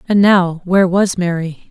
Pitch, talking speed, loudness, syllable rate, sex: 185 Hz, 175 wpm, -14 LUFS, 4.6 syllables/s, female